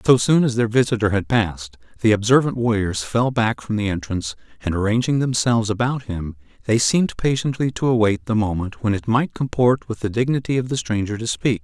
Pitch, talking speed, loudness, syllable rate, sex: 115 Hz, 200 wpm, -20 LUFS, 5.7 syllables/s, male